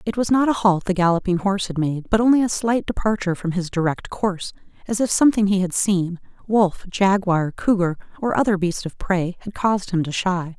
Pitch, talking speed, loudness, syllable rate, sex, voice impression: 190 Hz, 205 wpm, -20 LUFS, 5.6 syllables/s, female, feminine, adult-like, fluent, intellectual, slightly sweet